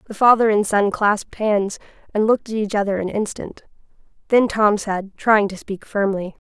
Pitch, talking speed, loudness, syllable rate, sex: 205 Hz, 185 wpm, -19 LUFS, 5.1 syllables/s, female